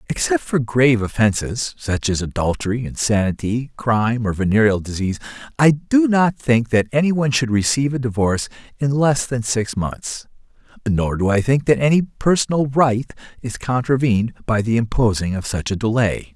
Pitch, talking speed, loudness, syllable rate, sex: 120 Hz, 160 wpm, -19 LUFS, 5.1 syllables/s, male